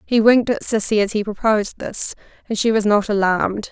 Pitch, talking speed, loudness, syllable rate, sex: 215 Hz, 210 wpm, -18 LUFS, 5.9 syllables/s, female